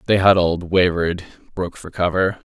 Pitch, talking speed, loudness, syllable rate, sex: 90 Hz, 145 wpm, -19 LUFS, 5.7 syllables/s, male